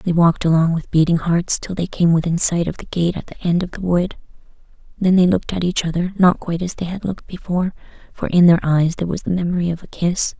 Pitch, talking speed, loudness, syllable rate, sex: 175 Hz, 255 wpm, -18 LUFS, 6.2 syllables/s, female